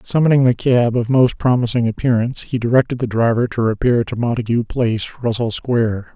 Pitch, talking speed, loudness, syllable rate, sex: 120 Hz, 175 wpm, -17 LUFS, 5.8 syllables/s, male